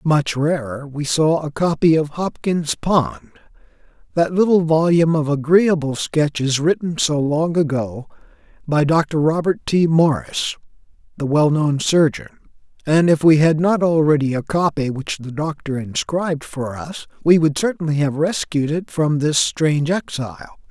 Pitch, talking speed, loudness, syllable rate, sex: 155 Hz, 150 wpm, -18 LUFS, 4.5 syllables/s, male